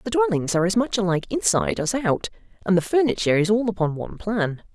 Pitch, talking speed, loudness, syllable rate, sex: 205 Hz, 215 wpm, -22 LUFS, 6.7 syllables/s, female